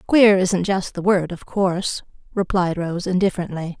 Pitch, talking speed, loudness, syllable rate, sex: 185 Hz, 160 wpm, -20 LUFS, 4.8 syllables/s, female